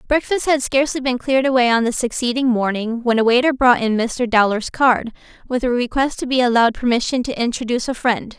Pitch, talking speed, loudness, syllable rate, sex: 245 Hz, 210 wpm, -18 LUFS, 6.0 syllables/s, female